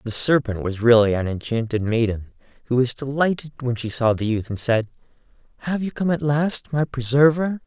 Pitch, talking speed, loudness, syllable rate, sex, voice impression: 125 Hz, 190 wpm, -21 LUFS, 5.2 syllables/s, male, masculine, adult-like, cool, slightly refreshing, sincere, calm, slightly sweet